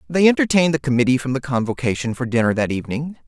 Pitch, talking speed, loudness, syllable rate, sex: 140 Hz, 200 wpm, -19 LUFS, 7.3 syllables/s, male